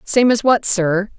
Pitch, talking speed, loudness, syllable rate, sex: 215 Hz, 205 wpm, -15 LUFS, 3.9 syllables/s, female